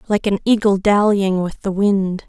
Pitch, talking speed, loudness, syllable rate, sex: 200 Hz, 185 wpm, -17 LUFS, 4.6 syllables/s, female